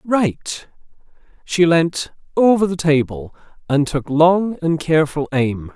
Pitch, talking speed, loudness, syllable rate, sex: 160 Hz, 125 wpm, -18 LUFS, 3.8 syllables/s, male